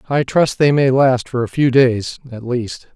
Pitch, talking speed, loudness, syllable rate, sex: 130 Hz, 225 wpm, -16 LUFS, 4.3 syllables/s, male